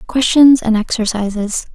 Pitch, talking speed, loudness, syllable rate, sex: 230 Hz, 105 wpm, -13 LUFS, 4.5 syllables/s, female